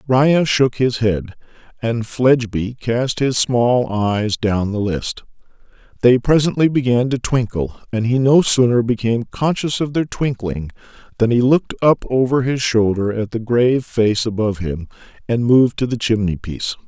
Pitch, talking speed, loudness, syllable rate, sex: 120 Hz, 165 wpm, -17 LUFS, 4.6 syllables/s, male